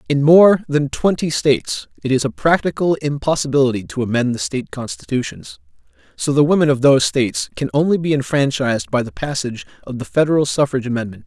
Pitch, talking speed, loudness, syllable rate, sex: 140 Hz, 175 wpm, -17 LUFS, 6.1 syllables/s, male